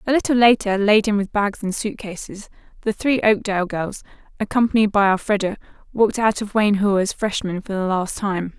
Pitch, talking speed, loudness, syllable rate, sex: 205 Hz, 190 wpm, -20 LUFS, 5.6 syllables/s, female